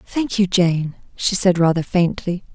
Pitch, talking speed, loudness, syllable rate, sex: 180 Hz, 165 wpm, -18 LUFS, 4.2 syllables/s, female